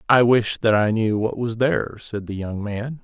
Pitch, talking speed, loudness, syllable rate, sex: 110 Hz, 240 wpm, -21 LUFS, 4.6 syllables/s, male